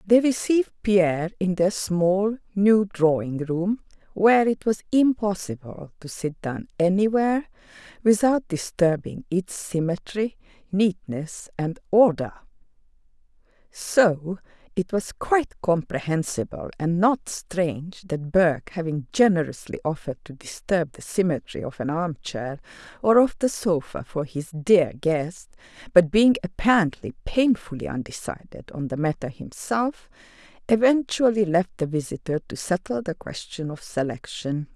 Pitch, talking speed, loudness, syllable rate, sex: 185 Hz, 125 wpm, -24 LUFS, 4.4 syllables/s, female